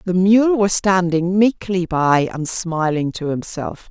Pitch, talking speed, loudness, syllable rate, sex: 180 Hz, 155 wpm, -17 LUFS, 3.7 syllables/s, female